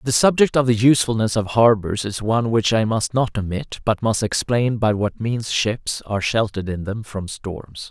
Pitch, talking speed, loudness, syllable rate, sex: 110 Hz, 205 wpm, -20 LUFS, 4.9 syllables/s, male